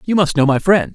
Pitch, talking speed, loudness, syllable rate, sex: 160 Hz, 315 wpm, -15 LUFS, 5.9 syllables/s, male